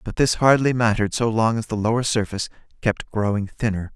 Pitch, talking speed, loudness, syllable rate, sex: 110 Hz, 195 wpm, -21 LUFS, 5.9 syllables/s, male